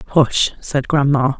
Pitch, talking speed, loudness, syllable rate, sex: 140 Hz, 130 wpm, -17 LUFS, 3.2 syllables/s, female